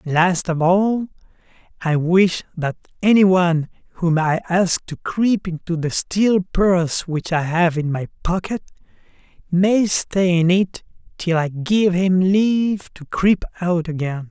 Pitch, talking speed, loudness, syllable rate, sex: 180 Hz, 150 wpm, -19 LUFS, 3.9 syllables/s, male